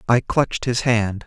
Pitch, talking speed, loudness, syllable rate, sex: 115 Hz, 190 wpm, -20 LUFS, 4.5 syllables/s, male